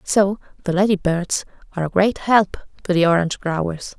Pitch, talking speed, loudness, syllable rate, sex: 185 Hz, 180 wpm, -20 LUFS, 5.1 syllables/s, female